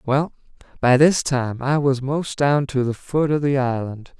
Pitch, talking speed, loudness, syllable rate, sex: 135 Hz, 200 wpm, -20 LUFS, 4.2 syllables/s, male